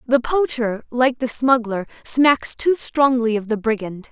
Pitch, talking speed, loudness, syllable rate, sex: 250 Hz, 160 wpm, -19 LUFS, 4.0 syllables/s, female